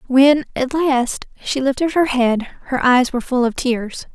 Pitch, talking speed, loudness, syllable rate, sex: 260 Hz, 190 wpm, -17 LUFS, 4.1 syllables/s, female